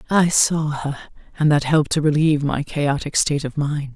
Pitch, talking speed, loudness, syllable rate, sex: 150 Hz, 195 wpm, -19 LUFS, 5.4 syllables/s, female